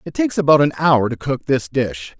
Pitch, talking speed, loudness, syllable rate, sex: 135 Hz, 245 wpm, -17 LUFS, 5.4 syllables/s, male